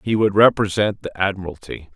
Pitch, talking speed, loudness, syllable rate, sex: 100 Hz, 155 wpm, -18 LUFS, 5.5 syllables/s, male